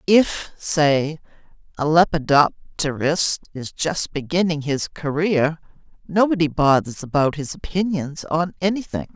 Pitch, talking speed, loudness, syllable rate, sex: 160 Hz, 105 wpm, -20 LUFS, 4.8 syllables/s, female